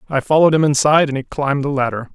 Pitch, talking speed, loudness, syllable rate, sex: 140 Hz, 250 wpm, -16 LUFS, 7.8 syllables/s, male